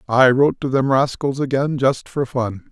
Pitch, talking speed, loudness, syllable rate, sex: 130 Hz, 200 wpm, -18 LUFS, 4.8 syllables/s, male